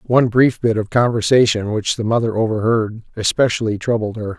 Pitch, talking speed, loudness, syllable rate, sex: 110 Hz, 165 wpm, -17 LUFS, 5.5 syllables/s, male